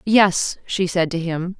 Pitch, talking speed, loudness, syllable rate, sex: 180 Hz, 190 wpm, -20 LUFS, 3.6 syllables/s, female